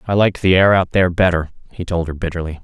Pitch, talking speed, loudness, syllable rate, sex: 90 Hz, 250 wpm, -16 LUFS, 7.0 syllables/s, male